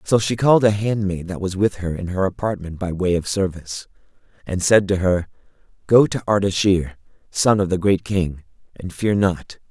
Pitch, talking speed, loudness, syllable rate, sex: 95 Hz, 190 wpm, -20 LUFS, 5.0 syllables/s, male